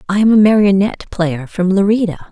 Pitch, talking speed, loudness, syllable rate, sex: 195 Hz, 180 wpm, -13 LUFS, 5.8 syllables/s, female